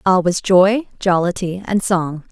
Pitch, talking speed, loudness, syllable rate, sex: 185 Hz, 155 wpm, -17 LUFS, 3.9 syllables/s, female